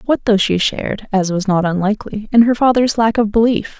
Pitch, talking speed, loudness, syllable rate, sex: 215 Hz, 190 wpm, -15 LUFS, 5.6 syllables/s, female